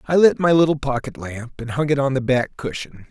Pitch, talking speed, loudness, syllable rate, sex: 135 Hz, 250 wpm, -19 LUFS, 5.4 syllables/s, male